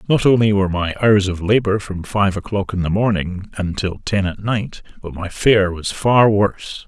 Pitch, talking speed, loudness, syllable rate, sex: 100 Hz, 200 wpm, -18 LUFS, 4.7 syllables/s, male